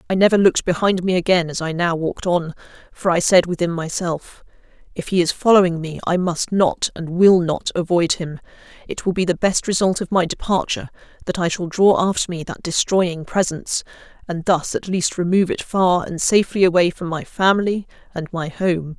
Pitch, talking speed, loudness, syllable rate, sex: 175 Hz, 195 wpm, -19 LUFS, 5.5 syllables/s, female